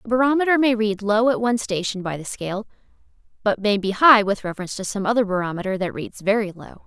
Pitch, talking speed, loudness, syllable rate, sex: 210 Hz, 220 wpm, -21 LUFS, 6.5 syllables/s, female